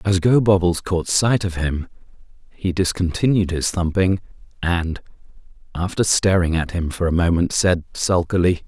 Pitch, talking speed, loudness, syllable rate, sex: 90 Hz, 140 wpm, -19 LUFS, 4.6 syllables/s, male